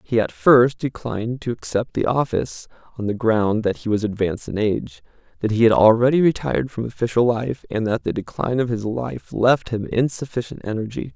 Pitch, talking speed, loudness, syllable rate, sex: 110 Hz, 195 wpm, -21 LUFS, 5.5 syllables/s, male